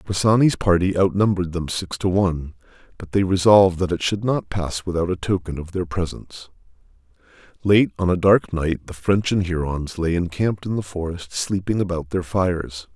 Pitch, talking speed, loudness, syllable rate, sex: 90 Hz, 180 wpm, -21 LUFS, 5.3 syllables/s, male